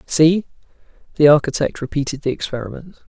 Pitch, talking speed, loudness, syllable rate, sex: 150 Hz, 115 wpm, -18 LUFS, 6.1 syllables/s, male